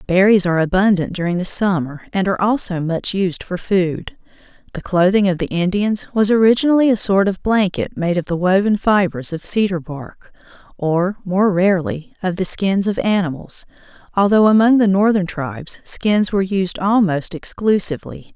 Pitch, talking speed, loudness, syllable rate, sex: 190 Hz, 165 wpm, -17 LUFS, 5.0 syllables/s, female